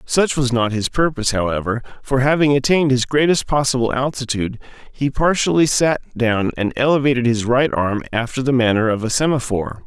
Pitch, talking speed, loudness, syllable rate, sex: 130 Hz, 170 wpm, -18 LUFS, 5.7 syllables/s, male